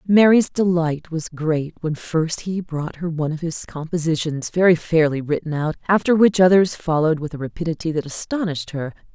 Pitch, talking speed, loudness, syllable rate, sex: 165 Hz, 170 wpm, -20 LUFS, 5.4 syllables/s, female